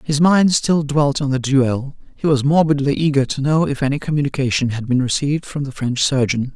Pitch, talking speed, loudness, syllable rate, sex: 140 Hz, 210 wpm, -18 LUFS, 5.4 syllables/s, male